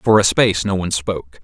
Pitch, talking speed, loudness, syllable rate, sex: 95 Hz, 250 wpm, -17 LUFS, 6.5 syllables/s, male